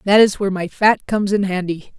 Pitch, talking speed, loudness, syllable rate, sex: 195 Hz, 240 wpm, -17 LUFS, 6.0 syllables/s, female